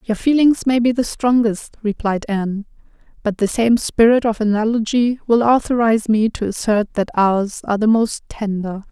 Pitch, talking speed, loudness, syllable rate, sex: 220 Hz, 170 wpm, -17 LUFS, 4.9 syllables/s, female